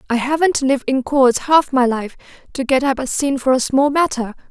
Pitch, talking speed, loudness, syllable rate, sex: 265 Hz, 225 wpm, -17 LUFS, 5.6 syllables/s, female